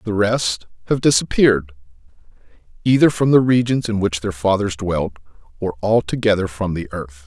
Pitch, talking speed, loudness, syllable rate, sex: 100 Hz, 150 wpm, -18 LUFS, 5.1 syllables/s, male